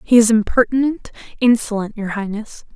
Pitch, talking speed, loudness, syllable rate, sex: 225 Hz, 130 wpm, -17 LUFS, 5.2 syllables/s, female